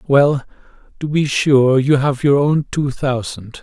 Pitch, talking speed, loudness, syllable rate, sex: 135 Hz, 165 wpm, -16 LUFS, 3.7 syllables/s, male